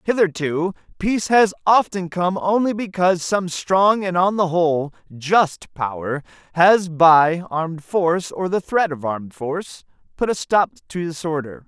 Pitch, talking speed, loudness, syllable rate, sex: 175 Hz, 155 wpm, -19 LUFS, 4.5 syllables/s, male